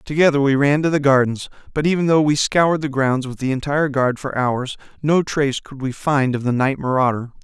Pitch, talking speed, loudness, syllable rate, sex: 140 Hz, 225 wpm, -18 LUFS, 5.6 syllables/s, male